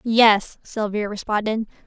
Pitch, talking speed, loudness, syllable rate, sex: 215 Hz, 95 wpm, -21 LUFS, 3.8 syllables/s, female